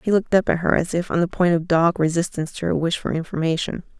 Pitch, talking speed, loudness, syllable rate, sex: 170 Hz, 270 wpm, -21 LUFS, 6.9 syllables/s, female